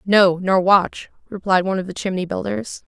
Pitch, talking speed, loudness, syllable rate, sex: 190 Hz, 180 wpm, -19 LUFS, 5.1 syllables/s, female